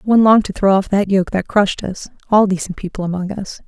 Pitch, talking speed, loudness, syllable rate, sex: 195 Hz, 245 wpm, -16 LUFS, 6.4 syllables/s, female